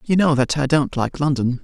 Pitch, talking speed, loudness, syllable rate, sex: 140 Hz, 255 wpm, -19 LUFS, 5.3 syllables/s, male